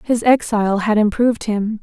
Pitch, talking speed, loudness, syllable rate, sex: 220 Hz, 165 wpm, -17 LUFS, 5.2 syllables/s, female